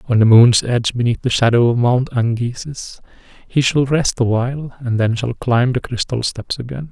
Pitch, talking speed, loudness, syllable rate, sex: 125 Hz, 190 wpm, -16 LUFS, 5.0 syllables/s, male